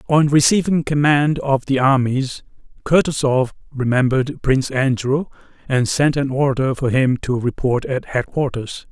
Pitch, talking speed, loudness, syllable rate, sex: 135 Hz, 135 wpm, -18 LUFS, 4.6 syllables/s, male